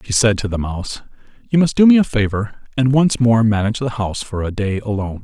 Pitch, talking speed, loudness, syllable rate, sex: 115 Hz, 240 wpm, -17 LUFS, 6.1 syllables/s, male